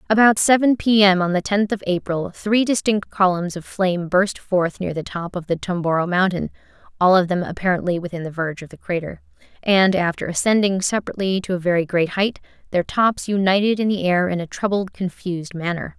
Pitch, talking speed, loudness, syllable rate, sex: 185 Hz, 200 wpm, -20 LUFS, 4.8 syllables/s, female